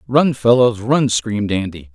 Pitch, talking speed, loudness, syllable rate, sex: 115 Hz, 155 wpm, -16 LUFS, 4.5 syllables/s, male